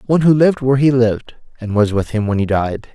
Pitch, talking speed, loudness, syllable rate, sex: 120 Hz, 265 wpm, -15 LUFS, 6.7 syllables/s, male